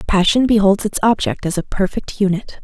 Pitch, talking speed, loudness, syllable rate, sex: 205 Hz, 180 wpm, -17 LUFS, 5.3 syllables/s, female